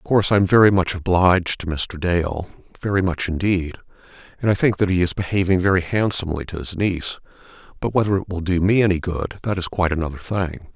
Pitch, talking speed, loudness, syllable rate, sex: 90 Hz, 200 wpm, -20 LUFS, 6.2 syllables/s, male